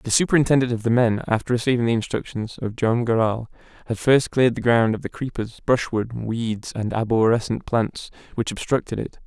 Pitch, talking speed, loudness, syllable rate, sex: 120 Hz, 180 wpm, -22 LUFS, 5.5 syllables/s, male